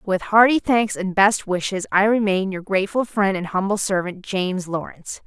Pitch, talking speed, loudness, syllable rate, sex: 195 Hz, 180 wpm, -20 LUFS, 5.0 syllables/s, female